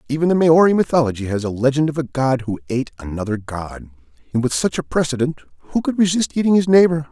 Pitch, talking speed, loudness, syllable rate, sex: 140 Hz, 210 wpm, -18 LUFS, 6.6 syllables/s, male